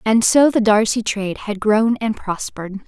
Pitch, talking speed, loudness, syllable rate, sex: 215 Hz, 190 wpm, -17 LUFS, 4.7 syllables/s, female